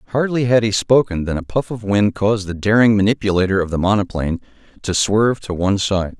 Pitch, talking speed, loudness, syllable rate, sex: 100 Hz, 205 wpm, -17 LUFS, 5.9 syllables/s, male